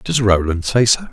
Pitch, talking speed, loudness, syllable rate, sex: 110 Hz, 215 wpm, -16 LUFS, 4.7 syllables/s, male